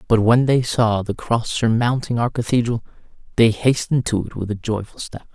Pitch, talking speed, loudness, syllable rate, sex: 115 Hz, 190 wpm, -19 LUFS, 5.2 syllables/s, male